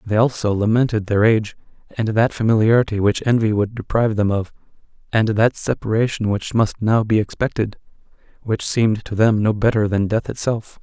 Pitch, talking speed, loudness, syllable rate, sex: 110 Hz, 170 wpm, -19 LUFS, 5.5 syllables/s, male